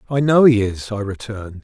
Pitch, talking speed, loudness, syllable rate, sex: 110 Hz, 220 wpm, -17 LUFS, 5.6 syllables/s, male